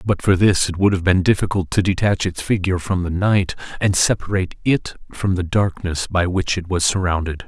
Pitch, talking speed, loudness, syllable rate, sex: 90 Hz, 210 wpm, -19 LUFS, 5.4 syllables/s, male